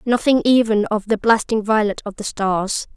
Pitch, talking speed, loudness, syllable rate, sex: 215 Hz, 180 wpm, -18 LUFS, 4.8 syllables/s, female